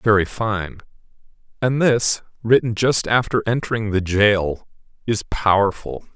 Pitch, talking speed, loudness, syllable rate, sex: 105 Hz, 125 wpm, -19 LUFS, 4.4 syllables/s, male